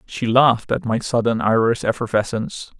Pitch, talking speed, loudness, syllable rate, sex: 115 Hz, 150 wpm, -19 LUFS, 5.4 syllables/s, male